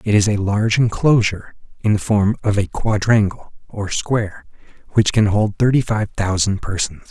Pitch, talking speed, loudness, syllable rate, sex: 105 Hz, 170 wpm, -18 LUFS, 4.9 syllables/s, male